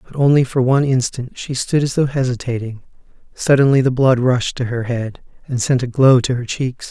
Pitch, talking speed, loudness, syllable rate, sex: 130 Hz, 210 wpm, -17 LUFS, 5.3 syllables/s, male